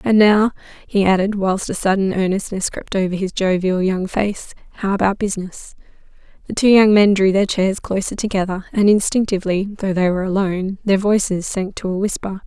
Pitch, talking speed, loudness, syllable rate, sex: 195 Hz, 185 wpm, -18 LUFS, 5.5 syllables/s, female